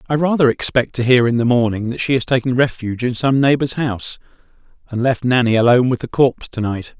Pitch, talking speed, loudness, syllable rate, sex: 125 Hz, 225 wpm, -17 LUFS, 6.2 syllables/s, male